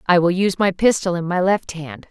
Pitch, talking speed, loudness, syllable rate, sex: 185 Hz, 255 wpm, -18 LUFS, 5.6 syllables/s, female